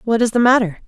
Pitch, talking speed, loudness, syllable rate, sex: 225 Hz, 275 wpm, -15 LUFS, 6.9 syllables/s, female